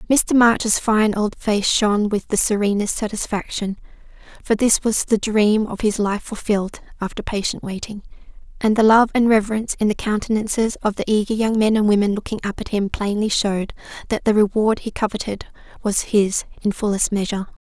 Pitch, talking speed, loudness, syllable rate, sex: 210 Hz, 180 wpm, -19 LUFS, 5.4 syllables/s, female